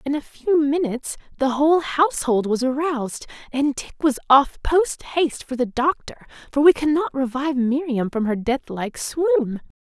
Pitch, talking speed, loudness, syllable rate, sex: 280 Hz, 170 wpm, -21 LUFS, 5.0 syllables/s, female